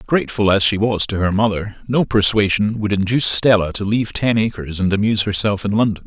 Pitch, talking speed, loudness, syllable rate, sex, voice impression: 105 Hz, 210 wpm, -17 LUFS, 6.0 syllables/s, male, masculine, middle-aged, thick, tensed, slightly hard, clear, fluent, slightly cool, calm, mature, slightly friendly, wild, lively, strict